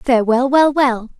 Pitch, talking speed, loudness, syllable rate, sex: 255 Hz, 150 wpm, -14 LUFS, 4.6 syllables/s, female